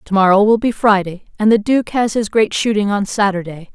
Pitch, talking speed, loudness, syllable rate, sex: 205 Hz, 225 wpm, -15 LUFS, 5.4 syllables/s, female